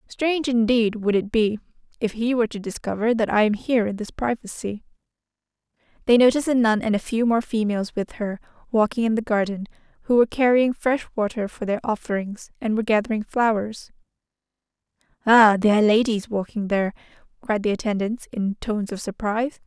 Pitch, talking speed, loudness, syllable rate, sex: 220 Hz, 175 wpm, -22 LUFS, 6.0 syllables/s, female